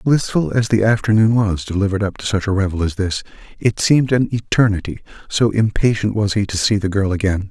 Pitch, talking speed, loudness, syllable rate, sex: 105 Hz, 210 wpm, -17 LUFS, 5.9 syllables/s, male